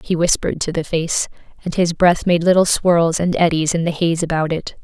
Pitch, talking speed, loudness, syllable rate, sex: 170 Hz, 225 wpm, -17 LUFS, 5.3 syllables/s, female